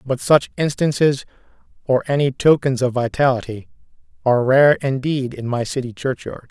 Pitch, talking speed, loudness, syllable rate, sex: 130 Hz, 140 wpm, -18 LUFS, 5.0 syllables/s, male